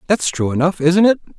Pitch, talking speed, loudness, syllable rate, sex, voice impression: 175 Hz, 215 wpm, -16 LUFS, 5.9 syllables/s, male, very masculine, adult-like, slightly middle-aged, thick, tensed, very powerful, very bright, slightly soft, very clear, very fluent, cool, intellectual, very refreshing, very sincere, calm, slightly mature, very friendly, very reassuring, very unique, slightly elegant, wild, sweet, very lively, kind, slightly intense, light